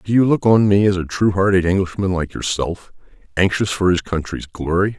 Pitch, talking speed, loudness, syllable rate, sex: 95 Hz, 205 wpm, -18 LUFS, 5.4 syllables/s, male